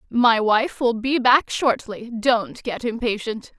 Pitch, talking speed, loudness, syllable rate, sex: 235 Hz, 150 wpm, -20 LUFS, 3.6 syllables/s, female